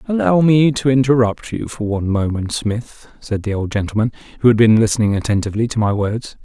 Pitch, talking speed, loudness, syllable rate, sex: 115 Hz, 195 wpm, -17 LUFS, 5.8 syllables/s, male